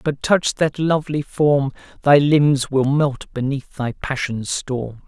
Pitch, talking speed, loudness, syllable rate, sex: 140 Hz, 155 wpm, -19 LUFS, 3.7 syllables/s, male